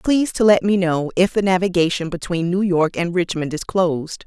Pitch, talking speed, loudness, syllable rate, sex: 180 Hz, 210 wpm, -19 LUFS, 5.3 syllables/s, female